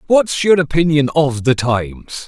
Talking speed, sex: 160 wpm, male